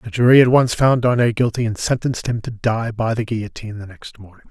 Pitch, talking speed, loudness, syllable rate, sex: 115 Hz, 240 wpm, -17 LUFS, 6.2 syllables/s, male